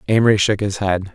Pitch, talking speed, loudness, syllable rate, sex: 100 Hz, 210 wpm, -17 LUFS, 6.1 syllables/s, male